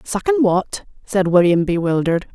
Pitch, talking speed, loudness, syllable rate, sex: 195 Hz, 130 wpm, -17 LUFS, 5.1 syllables/s, female